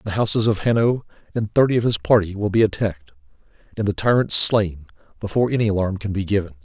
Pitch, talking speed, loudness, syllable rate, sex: 100 Hz, 200 wpm, -20 LUFS, 6.6 syllables/s, male